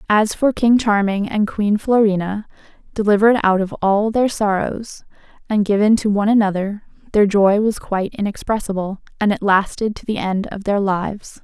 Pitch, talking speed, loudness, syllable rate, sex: 205 Hz, 170 wpm, -18 LUFS, 5.1 syllables/s, female